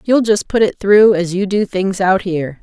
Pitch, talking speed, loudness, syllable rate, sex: 195 Hz, 250 wpm, -14 LUFS, 4.7 syllables/s, female